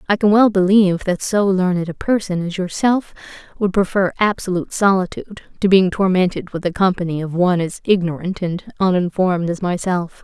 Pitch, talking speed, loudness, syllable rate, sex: 185 Hz, 170 wpm, -18 LUFS, 5.6 syllables/s, female